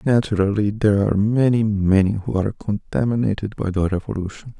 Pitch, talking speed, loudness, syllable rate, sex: 105 Hz, 145 wpm, -20 LUFS, 5.8 syllables/s, male